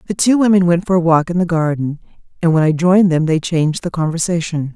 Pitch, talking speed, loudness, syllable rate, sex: 170 Hz, 240 wpm, -15 LUFS, 6.3 syllables/s, female